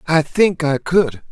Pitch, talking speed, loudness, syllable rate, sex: 160 Hz, 185 wpm, -17 LUFS, 3.6 syllables/s, male